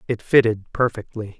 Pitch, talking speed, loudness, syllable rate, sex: 110 Hz, 130 wpm, -20 LUFS, 5.1 syllables/s, male